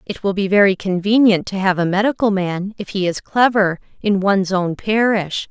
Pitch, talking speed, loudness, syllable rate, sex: 195 Hz, 175 wpm, -17 LUFS, 5.1 syllables/s, female